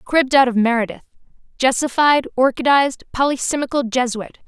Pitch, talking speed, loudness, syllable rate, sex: 255 Hz, 105 wpm, -17 LUFS, 5.9 syllables/s, female